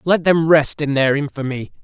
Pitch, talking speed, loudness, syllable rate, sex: 150 Hz, 195 wpm, -17 LUFS, 4.9 syllables/s, male